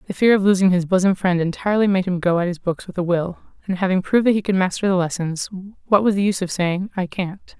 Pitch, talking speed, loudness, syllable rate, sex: 185 Hz, 270 wpm, -20 LUFS, 6.3 syllables/s, female